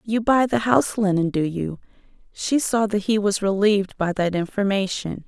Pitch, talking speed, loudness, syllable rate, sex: 200 Hz, 180 wpm, -21 LUFS, 5.0 syllables/s, female